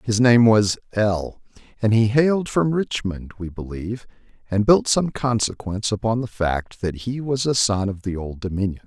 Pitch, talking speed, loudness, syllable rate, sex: 110 Hz, 185 wpm, -21 LUFS, 4.8 syllables/s, male